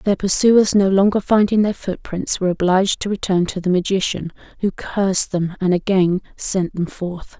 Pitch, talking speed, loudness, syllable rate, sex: 190 Hz, 180 wpm, -18 LUFS, 4.9 syllables/s, female